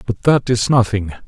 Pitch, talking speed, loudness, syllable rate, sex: 110 Hz, 190 wpm, -16 LUFS, 5.0 syllables/s, male